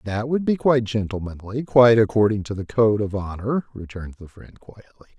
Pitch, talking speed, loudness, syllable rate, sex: 110 Hz, 185 wpm, -20 LUFS, 5.5 syllables/s, male